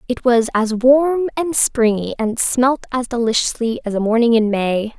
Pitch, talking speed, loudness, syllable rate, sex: 240 Hz, 180 wpm, -17 LUFS, 4.5 syllables/s, female